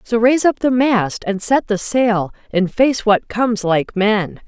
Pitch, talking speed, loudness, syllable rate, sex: 220 Hz, 200 wpm, -16 LUFS, 4.1 syllables/s, female